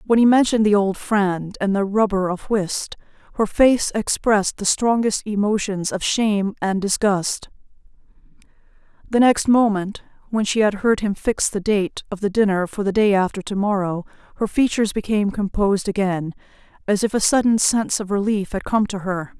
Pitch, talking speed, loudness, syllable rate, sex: 205 Hz, 175 wpm, -20 LUFS, 4.2 syllables/s, female